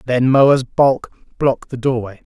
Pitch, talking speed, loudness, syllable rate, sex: 130 Hz, 155 wpm, -16 LUFS, 4.2 syllables/s, male